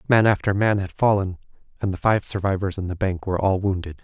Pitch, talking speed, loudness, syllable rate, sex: 95 Hz, 225 wpm, -22 LUFS, 6.1 syllables/s, male